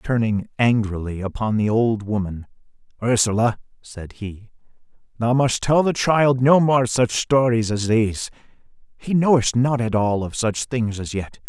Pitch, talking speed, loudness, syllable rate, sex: 115 Hz, 155 wpm, -20 LUFS, 4.3 syllables/s, male